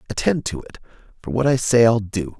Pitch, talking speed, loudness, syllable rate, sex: 110 Hz, 225 wpm, -19 LUFS, 6.2 syllables/s, male